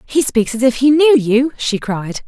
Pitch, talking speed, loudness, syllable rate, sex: 250 Hz, 235 wpm, -14 LUFS, 4.3 syllables/s, female